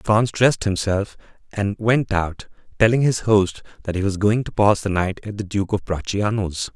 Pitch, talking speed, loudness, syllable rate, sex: 100 Hz, 195 wpm, -20 LUFS, 4.7 syllables/s, male